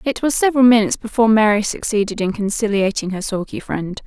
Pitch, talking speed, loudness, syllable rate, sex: 215 Hz, 175 wpm, -17 LUFS, 6.4 syllables/s, female